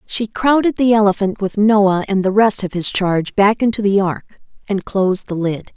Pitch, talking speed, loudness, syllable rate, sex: 205 Hz, 210 wpm, -16 LUFS, 4.9 syllables/s, female